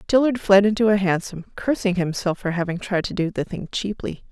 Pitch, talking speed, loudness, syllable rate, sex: 195 Hz, 210 wpm, -21 LUFS, 5.4 syllables/s, female